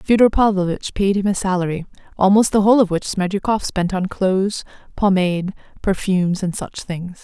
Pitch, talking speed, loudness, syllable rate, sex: 190 Hz, 165 wpm, -18 LUFS, 5.4 syllables/s, female